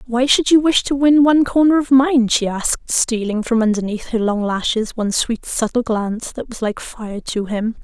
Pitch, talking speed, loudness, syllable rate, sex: 240 Hz, 215 wpm, -17 LUFS, 5.0 syllables/s, female